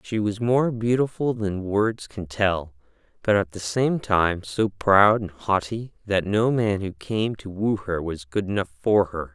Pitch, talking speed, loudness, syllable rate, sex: 100 Hz, 195 wpm, -23 LUFS, 3.9 syllables/s, male